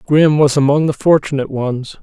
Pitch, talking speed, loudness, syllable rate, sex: 145 Hz, 180 wpm, -14 LUFS, 5.4 syllables/s, male